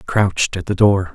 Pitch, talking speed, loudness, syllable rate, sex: 95 Hz, 210 wpm, -17 LUFS, 5.0 syllables/s, male